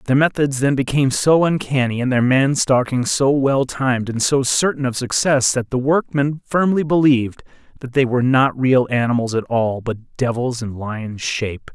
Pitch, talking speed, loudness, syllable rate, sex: 130 Hz, 185 wpm, -18 LUFS, 4.8 syllables/s, male